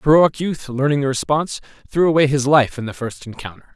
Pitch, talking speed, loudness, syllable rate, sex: 140 Hz, 225 wpm, -18 LUFS, 6.1 syllables/s, male